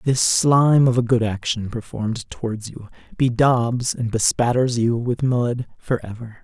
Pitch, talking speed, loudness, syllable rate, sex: 120 Hz, 160 wpm, -20 LUFS, 4.4 syllables/s, male